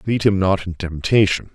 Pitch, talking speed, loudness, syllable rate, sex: 95 Hz, 195 wpm, -18 LUFS, 5.7 syllables/s, male